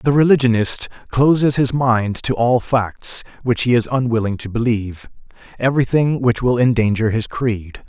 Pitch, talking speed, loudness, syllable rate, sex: 120 Hz, 150 wpm, -17 LUFS, 4.8 syllables/s, male